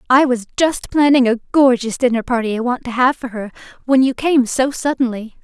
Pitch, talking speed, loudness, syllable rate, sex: 250 Hz, 210 wpm, -16 LUFS, 5.3 syllables/s, female